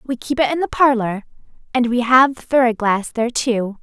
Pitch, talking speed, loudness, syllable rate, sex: 240 Hz, 220 wpm, -17 LUFS, 5.2 syllables/s, female